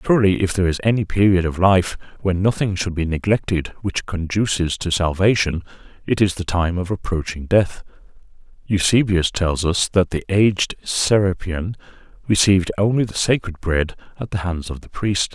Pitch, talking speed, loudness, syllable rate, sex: 95 Hz, 165 wpm, -19 LUFS, 5.1 syllables/s, male